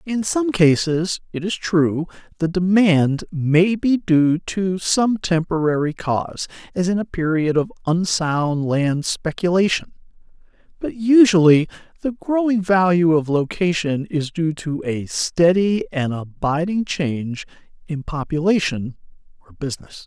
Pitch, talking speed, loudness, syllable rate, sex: 170 Hz, 125 wpm, -19 LUFS, 4.0 syllables/s, male